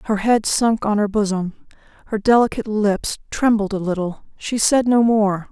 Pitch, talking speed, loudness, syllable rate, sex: 210 Hz, 175 wpm, -19 LUFS, 4.8 syllables/s, female